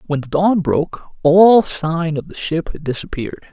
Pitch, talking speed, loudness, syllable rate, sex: 165 Hz, 190 wpm, -17 LUFS, 4.8 syllables/s, male